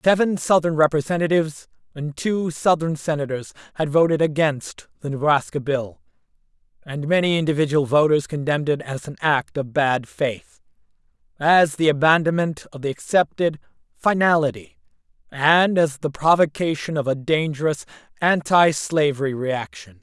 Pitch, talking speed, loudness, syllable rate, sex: 150 Hz, 120 wpm, -20 LUFS, 4.9 syllables/s, male